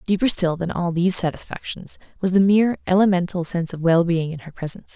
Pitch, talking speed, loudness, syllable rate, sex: 175 Hz, 195 wpm, -20 LUFS, 6.4 syllables/s, female